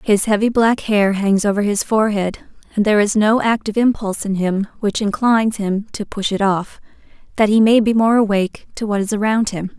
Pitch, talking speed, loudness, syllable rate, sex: 210 Hz, 210 wpm, -17 LUFS, 5.5 syllables/s, female